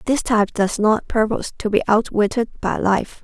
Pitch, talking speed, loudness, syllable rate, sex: 220 Hz, 185 wpm, -19 LUFS, 5.1 syllables/s, female